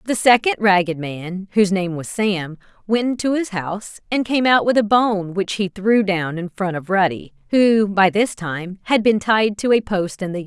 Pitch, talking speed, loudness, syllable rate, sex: 200 Hz, 220 wpm, -19 LUFS, 4.7 syllables/s, female